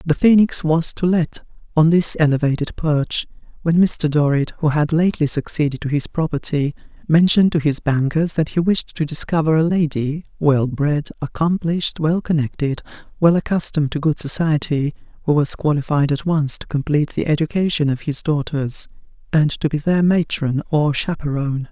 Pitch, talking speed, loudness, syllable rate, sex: 155 Hz, 165 wpm, -18 LUFS, 5.1 syllables/s, female